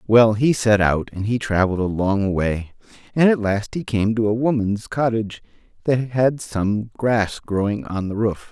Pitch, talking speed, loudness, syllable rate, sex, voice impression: 110 Hz, 190 wpm, -20 LUFS, 4.4 syllables/s, male, masculine, old, thick, tensed, powerful, slightly soft, clear, halting, calm, mature, friendly, reassuring, wild, lively, kind, slightly strict